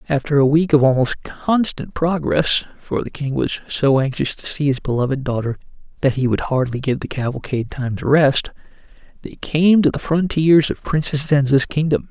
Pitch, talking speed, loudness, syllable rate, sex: 140 Hz, 185 wpm, -18 LUFS, 2.6 syllables/s, male